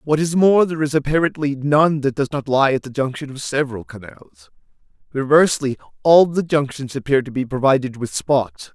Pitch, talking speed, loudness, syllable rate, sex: 140 Hz, 185 wpm, -18 LUFS, 5.5 syllables/s, male